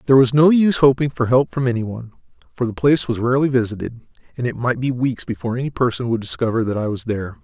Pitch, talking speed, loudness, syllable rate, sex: 125 Hz, 240 wpm, -19 LUFS, 7.2 syllables/s, male